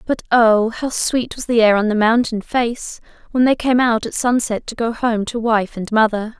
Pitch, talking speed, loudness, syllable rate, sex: 230 Hz, 225 wpm, -17 LUFS, 4.6 syllables/s, female